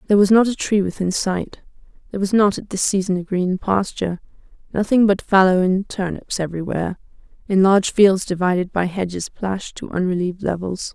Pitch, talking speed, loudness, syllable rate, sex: 190 Hz, 170 wpm, -19 LUFS, 5.8 syllables/s, female